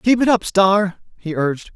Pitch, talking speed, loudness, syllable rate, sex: 195 Hz, 205 wpm, -17 LUFS, 4.8 syllables/s, male